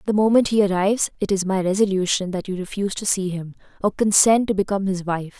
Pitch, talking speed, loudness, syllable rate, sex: 195 Hz, 220 wpm, -20 LUFS, 6.4 syllables/s, female